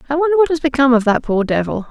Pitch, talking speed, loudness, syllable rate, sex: 275 Hz, 285 wpm, -15 LUFS, 7.6 syllables/s, female